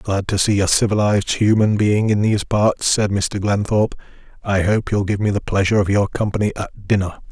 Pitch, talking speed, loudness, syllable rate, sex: 100 Hz, 205 wpm, -18 LUFS, 5.6 syllables/s, male